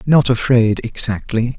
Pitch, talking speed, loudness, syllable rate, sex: 120 Hz, 115 wpm, -16 LUFS, 4.1 syllables/s, male